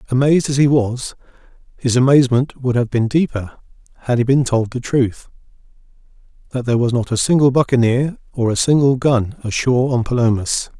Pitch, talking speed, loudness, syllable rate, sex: 125 Hz, 165 wpm, -17 LUFS, 5.6 syllables/s, male